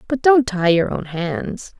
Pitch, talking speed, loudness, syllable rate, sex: 210 Hz, 200 wpm, -18 LUFS, 3.8 syllables/s, female